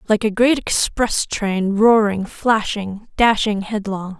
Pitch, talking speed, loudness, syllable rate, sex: 210 Hz, 145 wpm, -18 LUFS, 3.5 syllables/s, female